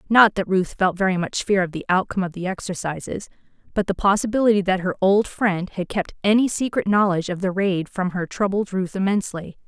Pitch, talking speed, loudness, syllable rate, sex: 190 Hz, 205 wpm, -21 LUFS, 5.8 syllables/s, female